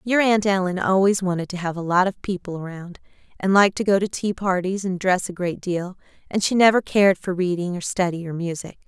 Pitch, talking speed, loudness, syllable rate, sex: 185 Hz, 230 wpm, -21 LUFS, 5.7 syllables/s, female